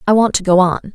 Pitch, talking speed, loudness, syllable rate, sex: 195 Hz, 320 wpm, -14 LUFS, 6.2 syllables/s, female